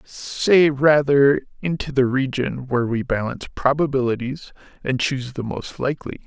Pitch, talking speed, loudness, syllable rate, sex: 135 Hz, 135 wpm, -20 LUFS, 4.8 syllables/s, male